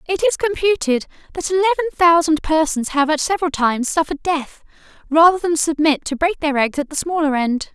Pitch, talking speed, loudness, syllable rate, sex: 315 Hz, 185 wpm, -18 LUFS, 5.8 syllables/s, female